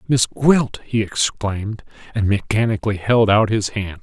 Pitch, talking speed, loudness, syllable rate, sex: 110 Hz, 150 wpm, -19 LUFS, 4.5 syllables/s, male